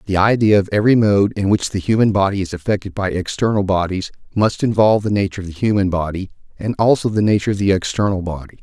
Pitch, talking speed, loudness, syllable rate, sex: 100 Hz, 215 wpm, -17 LUFS, 6.7 syllables/s, male